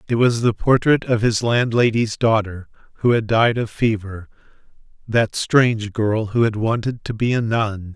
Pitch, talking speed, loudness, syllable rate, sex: 115 Hz, 175 wpm, -19 LUFS, 4.5 syllables/s, male